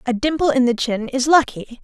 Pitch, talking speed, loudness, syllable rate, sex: 260 Hz, 230 wpm, -18 LUFS, 5.3 syllables/s, female